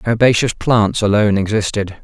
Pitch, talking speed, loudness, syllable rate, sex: 105 Hz, 120 wpm, -15 LUFS, 5.4 syllables/s, male